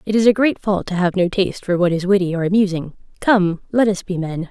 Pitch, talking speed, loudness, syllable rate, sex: 190 Hz, 255 wpm, -18 LUFS, 6.0 syllables/s, female